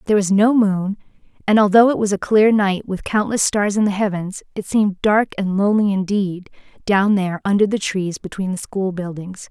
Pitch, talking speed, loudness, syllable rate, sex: 200 Hz, 200 wpm, -18 LUFS, 5.3 syllables/s, female